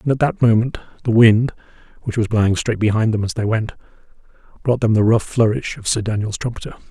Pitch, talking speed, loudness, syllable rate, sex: 110 Hz, 210 wpm, -18 LUFS, 6.1 syllables/s, male